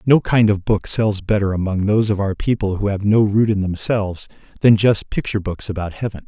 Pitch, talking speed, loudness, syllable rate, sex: 105 Hz, 220 wpm, -18 LUFS, 5.7 syllables/s, male